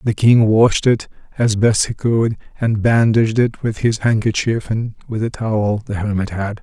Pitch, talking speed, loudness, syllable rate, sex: 110 Hz, 190 wpm, -17 LUFS, 4.7 syllables/s, male